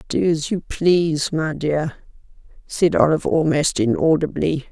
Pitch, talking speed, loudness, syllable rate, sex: 155 Hz, 125 wpm, -19 LUFS, 4.4 syllables/s, female